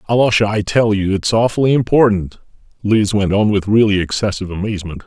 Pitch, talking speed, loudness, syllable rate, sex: 105 Hz, 165 wpm, -15 LUFS, 6.1 syllables/s, male